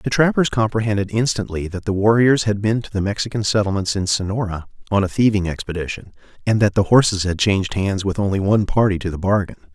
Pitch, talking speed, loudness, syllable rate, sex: 100 Hz, 205 wpm, -19 LUFS, 6.2 syllables/s, male